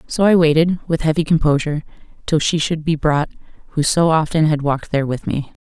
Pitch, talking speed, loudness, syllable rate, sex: 155 Hz, 200 wpm, -17 LUFS, 6.0 syllables/s, female